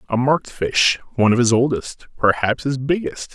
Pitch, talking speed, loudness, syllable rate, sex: 130 Hz, 180 wpm, -19 LUFS, 5.2 syllables/s, male